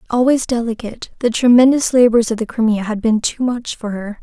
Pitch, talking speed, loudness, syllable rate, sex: 230 Hz, 200 wpm, -16 LUFS, 5.6 syllables/s, female